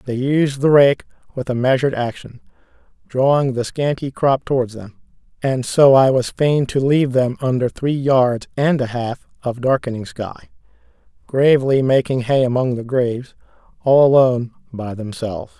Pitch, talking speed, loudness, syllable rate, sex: 130 Hz, 160 wpm, -17 LUFS, 4.8 syllables/s, male